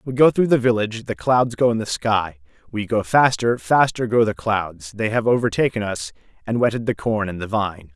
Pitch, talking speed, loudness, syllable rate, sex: 110 Hz, 220 wpm, -20 LUFS, 5.2 syllables/s, male